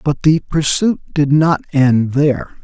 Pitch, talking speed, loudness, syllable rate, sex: 150 Hz, 160 wpm, -15 LUFS, 4.0 syllables/s, male